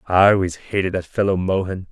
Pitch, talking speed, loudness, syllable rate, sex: 95 Hz, 190 wpm, -19 LUFS, 5.8 syllables/s, male